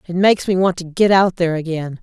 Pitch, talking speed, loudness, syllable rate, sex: 175 Hz, 265 wpm, -16 LUFS, 6.4 syllables/s, female